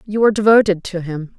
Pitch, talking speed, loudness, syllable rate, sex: 195 Hz, 215 wpm, -15 LUFS, 6.2 syllables/s, female